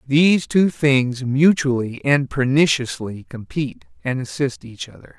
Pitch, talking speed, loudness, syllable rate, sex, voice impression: 135 Hz, 125 wpm, -19 LUFS, 4.3 syllables/s, male, masculine, adult-like, slightly refreshing, unique, slightly lively